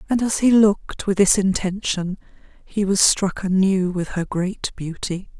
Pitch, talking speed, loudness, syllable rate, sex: 195 Hz, 165 wpm, -20 LUFS, 4.3 syllables/s, female